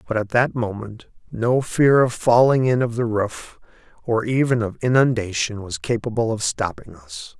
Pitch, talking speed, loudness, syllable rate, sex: 115 Hz, 170 wpm, -20 LUFS, 4.6 syllables/s, male